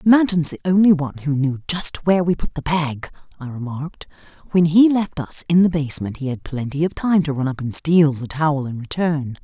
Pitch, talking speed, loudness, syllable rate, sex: 155 Hz, 225 wpm, -19 LUFS, 5.5 syllables/s, female